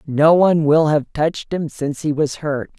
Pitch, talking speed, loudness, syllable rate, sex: 150 Hz, 215 wpm, -17 LUFS, 5.2 syllables/s, female